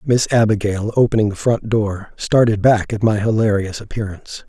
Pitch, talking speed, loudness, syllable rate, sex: 105 Hz, 160 wpm, -17 LUFS, 5.1 syllables/s, male